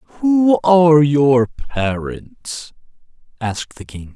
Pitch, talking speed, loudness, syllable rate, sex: 140 Hz, 100 wpm, -15 LUFS, 3.3 syllables/s, male